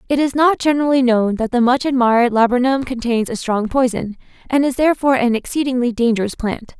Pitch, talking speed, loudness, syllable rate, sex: 250 Hz, 185 wpm, -17 LUFS, 6.1 syllables/s, female